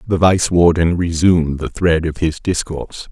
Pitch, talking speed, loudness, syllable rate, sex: 85 Hz, 175 wpm, -16 LUFS, 4.7 syllables/s, male